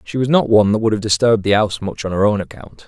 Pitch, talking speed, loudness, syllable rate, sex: 105 Hz, 315 wpm, -16 LUFS, 7.2 syllables/s, male